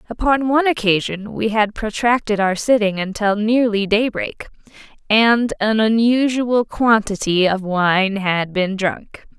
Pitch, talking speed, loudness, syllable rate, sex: 215 Hz, 130 wpm, -17 LUFS, 4.1 syllables/s, female